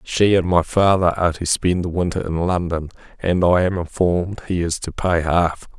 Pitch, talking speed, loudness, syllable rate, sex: 85 Hz, 210 wpm, -19 LUFS, 4.9 syllables/s, male